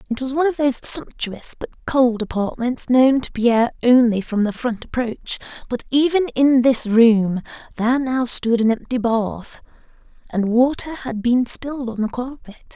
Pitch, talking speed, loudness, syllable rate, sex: 245 Hz, 170 wpm, -19 LUFS, 4.7 syllables/s, female